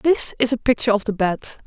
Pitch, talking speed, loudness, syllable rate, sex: 230 Hz, 250 wpm, -20 LUFS, 6.6 syllables/s, female